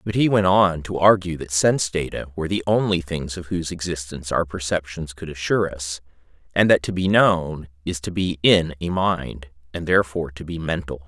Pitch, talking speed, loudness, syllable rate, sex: 85 Hz, 200 wpm, -21 LUFS, 5.4 syllables/s, male